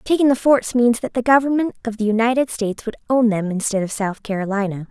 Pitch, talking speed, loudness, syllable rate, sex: 230 Hz, 220 wpm, -19 LUFS, 6.1 syllables/s, female